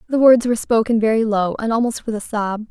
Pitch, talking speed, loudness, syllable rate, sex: 225 Hz, 245 wpm, -18 LUFS, 6.0 syllables/s, female